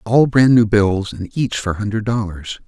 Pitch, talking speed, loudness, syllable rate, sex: 110 Hz, 225 wpm, -17 LUFS, 4.7 syllables/s, male